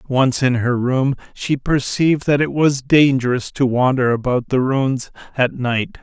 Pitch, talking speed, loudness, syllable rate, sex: 130 Hz, 170 wpm, -17 LUFS, 4.2 syllables/s, male